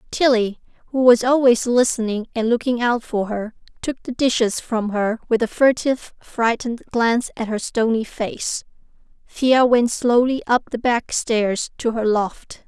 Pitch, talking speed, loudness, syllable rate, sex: 235 Hz, 160 wpm, -19 LUFS, 4.4 syllables/s, female